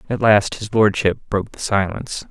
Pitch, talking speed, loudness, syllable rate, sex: 105 Hz, 180 wpm, -19 LUFS, 5.5 syllables/s, male